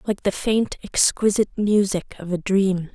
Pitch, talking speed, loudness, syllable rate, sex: 195 Hz, 165 wpm, -21 LUFS, 4.6 syllables/s, female